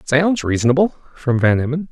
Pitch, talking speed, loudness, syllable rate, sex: 145 Hz, 155 wpm, -17 LUFS, 5.5 syllables/s, male